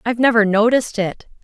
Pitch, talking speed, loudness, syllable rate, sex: 225 Hz, 165 wpm, -16 LUFS, 6.6 syllables/s, female